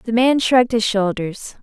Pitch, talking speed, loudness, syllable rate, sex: 225 Hz, 185 wpm, -17 LUFS, 4.5 syllables/s, female